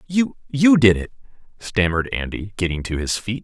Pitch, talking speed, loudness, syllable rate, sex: 110 Hz, 155 wpm, -20 LUFS, 5.1 syllables/s, male